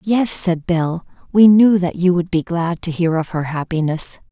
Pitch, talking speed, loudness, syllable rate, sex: 175 Hz, 210 wpm, -17 LUFS, 4.5 syllables/s, female